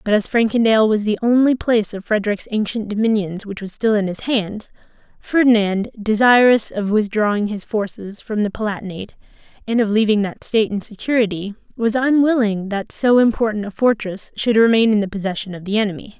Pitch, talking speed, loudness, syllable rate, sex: 215 Hz, 180 wpm, -18 LUFS, 5.7 syllables/s, female